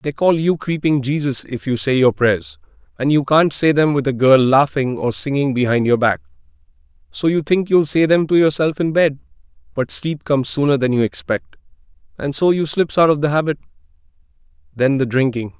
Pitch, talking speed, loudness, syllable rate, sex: 140 Hz, 200 wpm, -17 LUFS, 5.3 syllables/s, male